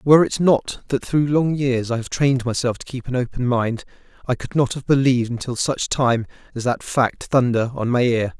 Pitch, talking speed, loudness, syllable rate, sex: 125 Hz, 220 wpm, -20 LUFS, 5.1 syllables/s, male